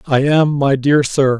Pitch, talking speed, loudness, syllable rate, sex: 140 Hz, 215 wpm, -14 LUFS, 4.0 syllables/s, male